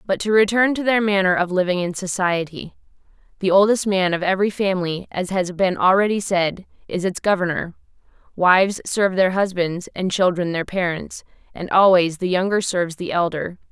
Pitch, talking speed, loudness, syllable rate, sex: 185 Hz, 170 wpm, -19 LUFS, 5.3 syllables/s, female